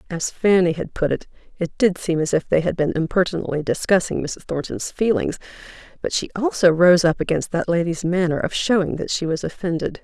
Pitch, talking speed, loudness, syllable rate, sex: 170 Hz, 195 wpm, -20 LUFS, 5.6 syllables/s, female